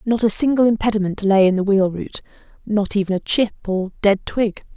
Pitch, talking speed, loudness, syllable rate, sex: 205 Hz, 190 wpm, -18 LUFS, 5.4 syllables/s, female